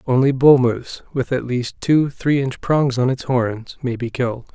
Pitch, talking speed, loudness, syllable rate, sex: 130 Hz, 200 wpm, -19 LUFS, 4.5 syllables/s, male